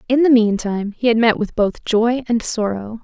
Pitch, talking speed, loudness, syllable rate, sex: 225 Hz, 220 wpm, -17 LUFS, 5.0 syllables/s, female